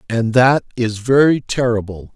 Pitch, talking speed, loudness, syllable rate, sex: 120 Hz, 140 wpm, -16 LUFS, 4.3 syllables/s, male